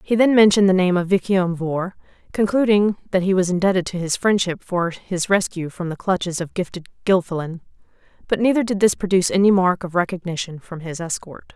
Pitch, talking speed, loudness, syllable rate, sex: 185 Hz, 195 wpm, -20 LUFS, 5.6 syllables/s, female